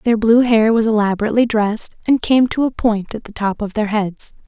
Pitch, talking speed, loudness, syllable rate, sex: 220 Hz, 230 wpm, -16 LUFS, 5.5 syllables/s, female